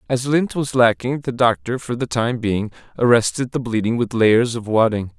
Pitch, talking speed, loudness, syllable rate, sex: 120 Hz, 195 wpm, -19 LUFS, 4.9 syllables/s, male